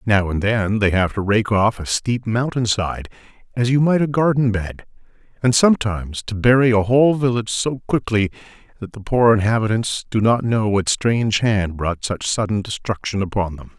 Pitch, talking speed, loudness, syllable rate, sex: 110 Hz, 185 wpm, -19 LUFS, 5.1 syllables/s, male